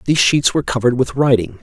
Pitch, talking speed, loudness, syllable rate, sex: 125 Hz, 220 wpm, -15 LUFS, 7.4 syllables/s, male